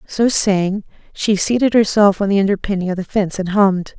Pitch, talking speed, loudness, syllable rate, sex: 200 Hz, 195 wpm, -16 LUFS, 5.6 syllables/s, female